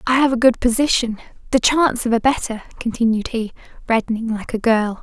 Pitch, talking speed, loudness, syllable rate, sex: 235 Hz, 180 wpm, -18 LUFS, 5.9 syllables/s, female